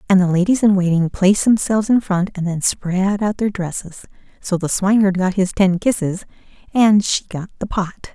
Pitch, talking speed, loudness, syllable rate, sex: 195 Hz, 200 wpm, -17 LUFS, 5.2 syllables/s, female